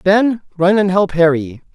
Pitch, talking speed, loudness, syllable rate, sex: 185 Hz, 170 wpm, -14 LUFS, 4.1 syllables/s, male